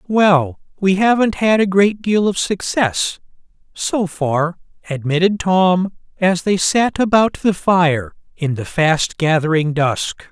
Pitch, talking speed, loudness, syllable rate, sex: 180 Hz, 135 wpm, -16 LUFS, 3.6 syllables/s, male